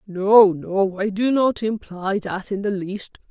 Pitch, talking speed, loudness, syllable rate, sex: 200 Hz, 180 wpm, -20 LUFS, 3.7 syllables/s, female